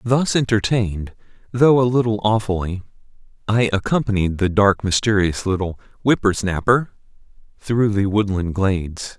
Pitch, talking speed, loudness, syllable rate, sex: 105 Hz, 120 wpm, -19 LUFS, 4.8 syllables/s, male